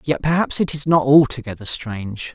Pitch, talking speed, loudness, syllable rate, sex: 135 Hz, 180 wpm, -18 LUFS, 5.3 syllables/s, male